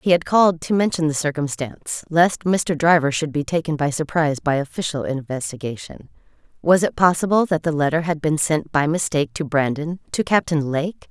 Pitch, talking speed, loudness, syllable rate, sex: 155 Hz, 180 wpm, -20 LUFS, 5.4 syllables/s, female